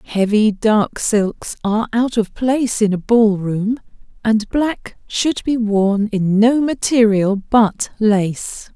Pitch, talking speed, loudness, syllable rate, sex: 220 Hz, 145 wpm, -17 LUFS, 3.3 syllables/s, female